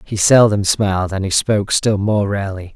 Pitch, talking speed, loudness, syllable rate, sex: 100 Hz, 195 wpm, -16 LUFS, 5.3 syllables/s, male